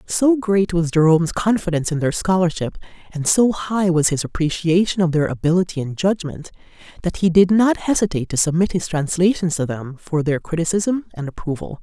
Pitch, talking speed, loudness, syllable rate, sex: 175 Hz, 180 wpm, -19 LUFS, 5.5 syllables/s, female